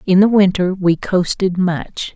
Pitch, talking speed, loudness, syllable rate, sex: 185 Hz, 165 wpm, -16 LUFS, 3.9 syllables/s, female